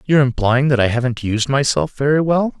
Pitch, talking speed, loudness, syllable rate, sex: 130 Hz, 210 wpm, -17 LUFS, 5.7 syllables/s, male